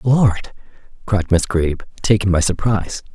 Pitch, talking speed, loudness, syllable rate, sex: 100 Hz, 135 wpm, -18 LUFS, 4.9 syllables/s, male